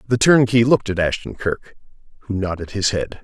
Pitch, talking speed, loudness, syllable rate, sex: 105 Hz, 185 wpm, -19 LUFS, 5.7 syllables/s, male